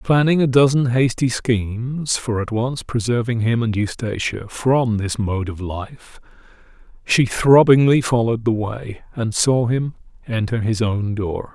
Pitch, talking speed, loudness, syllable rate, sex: 120 Hz, 150 wpm, -19 LUFS, 4.2 syllables/s, male